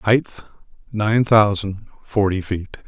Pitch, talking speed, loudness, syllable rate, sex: 105 Hz, 105 wpm, -19 LUFS, 4.0 syllables/s, male